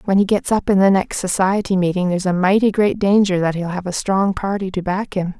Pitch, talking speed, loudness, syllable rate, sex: 190 Hz, 255 wpm, -18 LUFS, 5.7 syllables/s, female